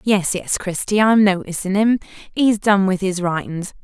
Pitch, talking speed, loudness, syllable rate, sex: 195 Hz, 170 wpm, -18 LUFS, 4.3 syllables/s, female